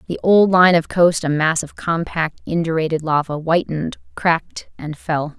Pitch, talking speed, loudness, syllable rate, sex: 165 Hz, 165 wpm, -18 LUFS, 4.7 syllables/s, female